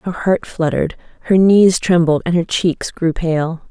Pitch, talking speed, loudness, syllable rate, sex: 170 Hz, 180 wpm, -15 LUFS, 4.3 syllables/s, female